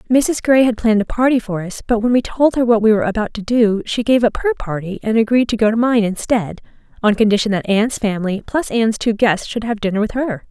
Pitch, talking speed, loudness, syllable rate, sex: 225 Hz, 255 wpm, -16 LUFS, 6.1 syllables/s, female